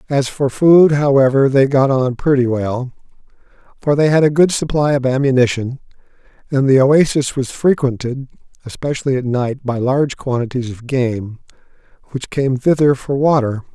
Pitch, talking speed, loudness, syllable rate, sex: 135 Hz, 155 wpm, -15 LUFS, 4.9 syllables/s, male